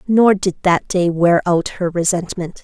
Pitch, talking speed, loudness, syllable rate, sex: 180 Hz, 180 wpm, -16 LUFS, 4.1 syllables/s, female